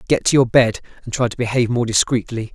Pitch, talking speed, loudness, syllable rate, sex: 120 Hz, 235 wpm, -18 LUFS, 6.6 syllables/s, male